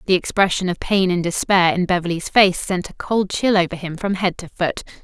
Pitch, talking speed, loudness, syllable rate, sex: 180 Hz, 225 wpm, -19 LUFS, 5.3 syllables/s, female